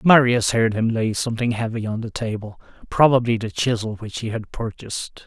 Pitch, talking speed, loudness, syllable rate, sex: 115 Hz, 180 wpm, -21 LUFS, 5.4 syllables/s, male